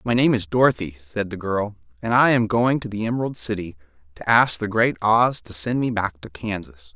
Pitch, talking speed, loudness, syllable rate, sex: 105 Hz, 225 wpm, -21 LUFS, 5.3 syllables/s, male